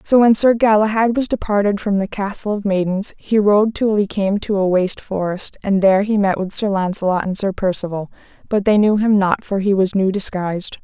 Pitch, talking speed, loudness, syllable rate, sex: 200 Hz, 220 wpm, -17 LUFS, 5.5 syllables/s, female